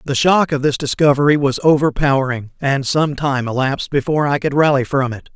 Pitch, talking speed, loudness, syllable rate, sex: 140 Hz, 190 wpm, -16 LUFS, 5.7 syllables/s, male